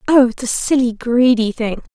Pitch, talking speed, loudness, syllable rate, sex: 245 Hz, 155 wpm, -16 LUFS, 4.2 syllables/s, female